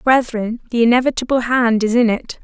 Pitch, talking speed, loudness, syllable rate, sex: 240 Hz, 175 wpm, -16 LUFS, 5.2 syllables/s, female